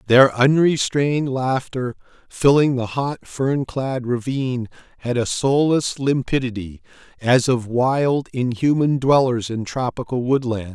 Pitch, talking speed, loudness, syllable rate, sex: 130 Hz, 115 wpm, -20 LUFS, 4.0 syllables/s, male